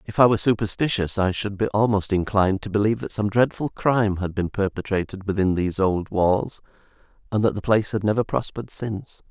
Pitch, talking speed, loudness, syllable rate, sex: 100 Hz, 195 wpm, -22 LUFS, 6.1 syllables/s, male